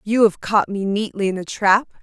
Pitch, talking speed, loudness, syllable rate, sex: 205 Hz, 235 wpm, -19 LUFS, 4.9 syllables/s, female